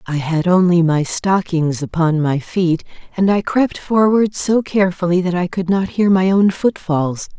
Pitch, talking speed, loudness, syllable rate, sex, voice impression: 180 Hz, 180 wpm, -16 LUFS, 4.4 syllables/s, female, very feminine, very adult-like, thin, very tensed, very powerful, bright, soft, slightly clear, fluent, slightly raspy, cute, very intellectual, refreshing, sincere, very calm, friendly, reassuring, unique, elegant, slightly wild, very sweet, slightly lively, kind, slightly sharp, modest